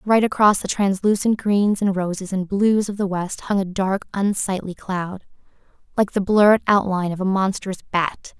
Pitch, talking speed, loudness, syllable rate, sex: 195 Hz, 180 wpm, -20 LUFS, 4.8 syllables/s, female